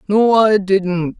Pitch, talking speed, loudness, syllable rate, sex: 200 Hz, 150 wpm, -14 LUFS, 3.0 syllables/s, male